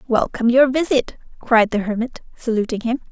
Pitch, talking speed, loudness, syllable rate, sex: 240 Hz, 155 wpm, -19 LUFS, 5.5 syllables/s, female